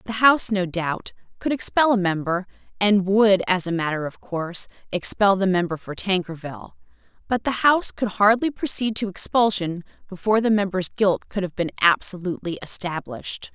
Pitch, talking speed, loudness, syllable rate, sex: 195 Hz, 160 wpm, -22 LUFS, 5.3 syllables/s, female